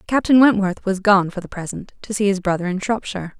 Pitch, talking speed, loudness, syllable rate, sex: 200 Hz, 230 wpm, -19 LUFS, 6.0 syllables/s, female